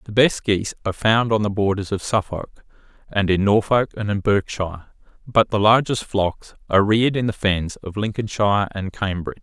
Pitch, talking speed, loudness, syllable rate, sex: 105 Hz, 180 wpm, -20 LUFS, 5.2 syllables/s, male